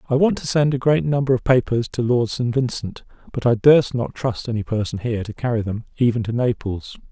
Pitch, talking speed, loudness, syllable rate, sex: 120 Hz, 230 wpm, -20 LUFS, 5.6 syllables/s, male